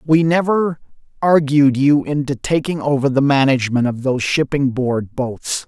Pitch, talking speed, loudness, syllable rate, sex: 140 Hz, 150 wpm, -17 LUFS, 4.7 syllables/s, male